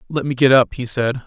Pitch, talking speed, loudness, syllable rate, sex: 130 Hz, 285 wpm, -17 LUFS, 5.7 syllables/s, male